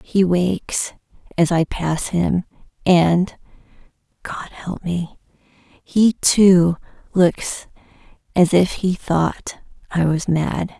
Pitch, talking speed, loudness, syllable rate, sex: 175 Hz, 110 wpm, -19 LUFS, 2.9 syllables/s, female